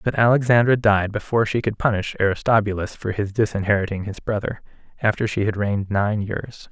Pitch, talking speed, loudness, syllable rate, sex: 105 Hz, 170 wpm, -21 LUFS, 5.8 syllables/s, male